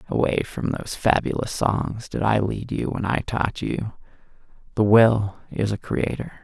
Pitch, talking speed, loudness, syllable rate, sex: 105 Hz, 170 wpm, -23 LUFS, 4.4 syllables/s, male